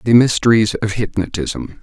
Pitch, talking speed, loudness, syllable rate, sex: 105 Hz, 130 wpm, -16 LUFS, 4.9 syllables/s, male